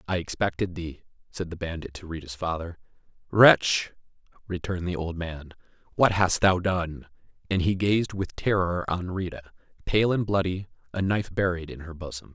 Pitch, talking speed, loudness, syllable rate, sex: 90 Hz, 160 wpm, -26 LUFS, 5.0 syllables/s, male